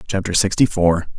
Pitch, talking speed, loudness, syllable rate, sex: 95 Hz, 150 wpm, -17 LUFS, 5.4 syllables/s, male